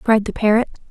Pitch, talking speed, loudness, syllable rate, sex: 220 Hz, 200 wpm, -18 LUFS, 6.7 syllables/s, female